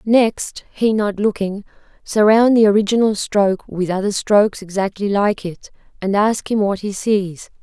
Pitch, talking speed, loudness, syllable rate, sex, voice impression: 205 Hz, 155 wpm, -17 LUFS, 4.5 syllables/s, female, feminine, adult-like, slightly relaxed, slightly weak, soft, fluent, calm, elegant, kind, modest